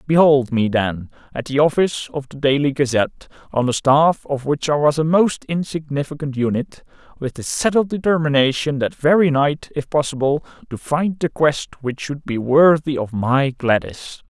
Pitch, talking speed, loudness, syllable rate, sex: 145 Hz, 170 wpm, -18 LUFS, 4.8 syllables/s, male